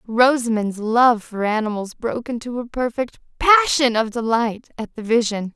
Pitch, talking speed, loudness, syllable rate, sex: 235 Hz, 150 wpm, -19 LUFS, 4.7 syllables/s, female